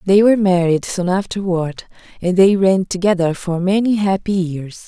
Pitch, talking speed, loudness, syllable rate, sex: 185 Hz, 160 wpm, -16 LUFS, 5.0 syllables/s, female